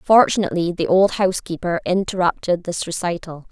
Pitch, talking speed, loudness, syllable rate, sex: 180 Hz, 120 wpm, -19 LUFS, 5.7 syllables/s, female